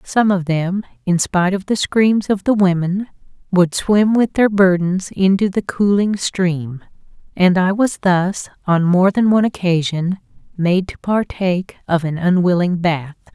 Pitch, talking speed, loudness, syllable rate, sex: 185 Hz, 160 wpm, -17 LUFS, 4.3 syllables/s, female